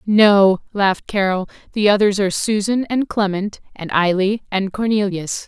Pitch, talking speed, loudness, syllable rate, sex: 200 Hz, 140 wpm, -18 LUFS, 4.4 syllables/s, female